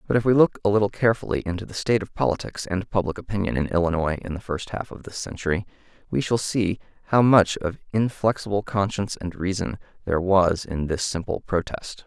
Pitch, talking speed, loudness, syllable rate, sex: 95 Hz, 200 wpm, -24 LUFS, 6.1 syllables/s, male